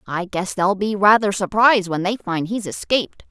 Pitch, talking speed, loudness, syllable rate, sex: 200 Hz, 200 wpm, -19 LUFS, 5.1 syllables/s, female